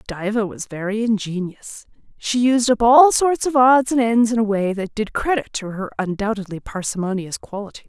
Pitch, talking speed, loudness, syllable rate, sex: 220 Hz, 185 wpm, -19 LUFS, 5.0 syllables/s, female